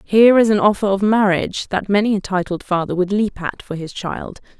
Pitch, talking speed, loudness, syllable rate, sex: 195 Hz, 220 wpm, -17 LUFS, 5.6 syllables/s, female